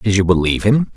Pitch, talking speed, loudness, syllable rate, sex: 100 Hz, 250 wpm, -15 LUFS, 6.6 syllables/s, male